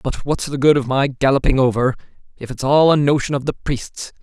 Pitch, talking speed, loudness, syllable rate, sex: 135 Hz, 225 wpm, -17 LUFS, 5.5 syllables/s, male